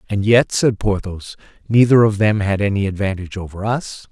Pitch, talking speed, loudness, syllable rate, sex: 105 Hz, 175 wpm, -17 LUFS, 5.3 syllables/s, male